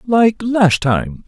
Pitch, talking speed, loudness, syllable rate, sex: 190 Hz, 140 wpm, -15 LUFS, 2.7 syllables/s, male